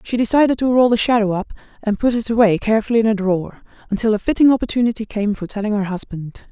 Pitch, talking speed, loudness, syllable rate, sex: 220 Hz, 220 wpm, -18 LUFS, 6.9 syllables/s, female